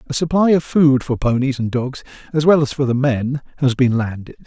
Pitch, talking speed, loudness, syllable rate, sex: 135 Hz, 230 wpm, -17 LUFS, 5.3 syllables/s, male